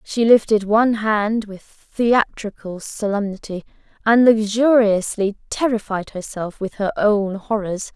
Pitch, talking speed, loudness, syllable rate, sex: 210 Hz, 105 wpm, -19 LUFS, 4.0 syllables/s, female